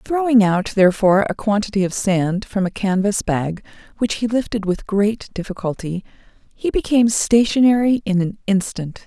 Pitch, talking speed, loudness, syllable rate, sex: 205 Hz, 150 wpm, -18 LUFS, 5.1 syllables/s, female